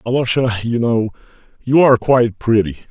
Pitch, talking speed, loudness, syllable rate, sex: 115 Hz, 145 wpm, -15 LUFS, 5.9 syllables/s, male